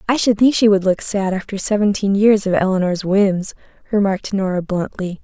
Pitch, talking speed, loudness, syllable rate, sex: 200 Hz, 185 wpm, -17 LUFS, 5.3 syllables/s, female